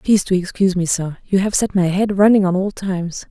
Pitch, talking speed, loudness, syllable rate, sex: 190 Hz, 255 wpm, -17 LUFS, 6.1 syllables/s, female